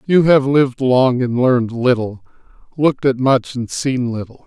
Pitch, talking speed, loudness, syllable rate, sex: 125 Hz, 175 wpm, -16 LUFS, 4.8 syllables/s, male